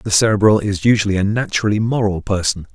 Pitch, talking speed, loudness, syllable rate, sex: 105 Hz, 175 wpm, -16 LUFS, 6.6 syllables/s, male